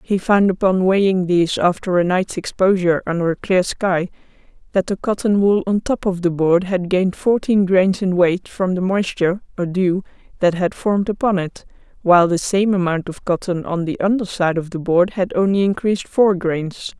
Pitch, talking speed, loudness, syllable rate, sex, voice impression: 185 Hz, 200 wpm, -18 LUFS, 5.1 syllables/s, female, very feminine, slightly young, thin, tensed, weak, slightly dark, slightly soft, clear, fluent, slightly raspy, slightly cute, intellectual, refreshing, sincere, calm, friendly, reassuring, unique, elegant, slightly wild, sweet, lively, slightly strict, slightly intense, sharp, slightly modest, light